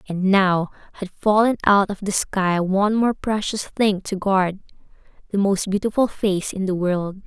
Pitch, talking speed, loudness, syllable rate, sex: 195 Hz, 165 wpm, -20 LUFS, 4.4 syllables/s, female